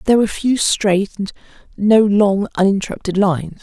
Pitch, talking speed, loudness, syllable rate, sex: 200 Hz, 150 wpm, -16 LUFS, 5.4 syllables/s, female